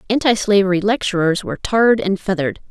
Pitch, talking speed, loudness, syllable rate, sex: 195 Hz, 155 wpm, -17 LUFS, 6.5 syllables/s, female